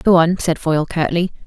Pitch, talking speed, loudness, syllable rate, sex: 165 Hz, 205 wpm, -17 LUFS, 5.5 syllables/s, female